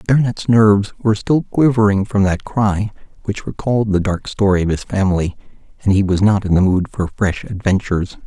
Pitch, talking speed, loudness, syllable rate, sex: 100 Hz, 195 wpm, -17 LUFS, 5.7 syllables/s, male